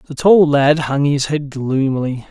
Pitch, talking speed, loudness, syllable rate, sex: 145 Hz, 180 wpm, -15 LUFS, 4.0 syllables/s, male